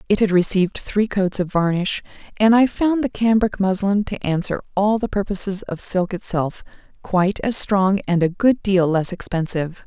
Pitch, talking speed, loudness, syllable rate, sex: 195 Hz, 180 wpm, -19 LUFS, 4.9 syllables/s, female